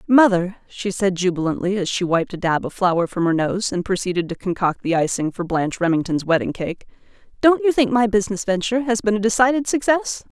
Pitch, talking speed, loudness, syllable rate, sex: 200 Hz, 210 wpm, -20 LUFS, 5.8 syllables/s, female